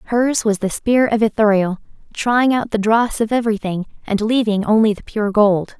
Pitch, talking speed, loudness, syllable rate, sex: 215 Hz, 185 wpm, -17 LUFS, 5.0 syllables/s, female